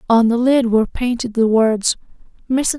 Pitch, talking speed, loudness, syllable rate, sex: 235 Hz, 150 wpm, -16 LUFS, 4.8 syllables/s, female